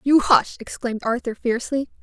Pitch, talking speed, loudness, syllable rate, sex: 250 Hz, 150 wpm, -21 LUFS, 5.7 syllables/s, female